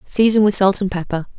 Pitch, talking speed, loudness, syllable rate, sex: 195 Hz, 215 wpm, -17 LUFS, 5.7 syllables/s, female